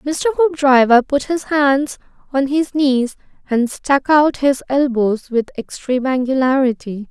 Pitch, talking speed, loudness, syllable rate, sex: 270 Hz, 135 wpm, -16 LUFS, 4.1 syllables/s, female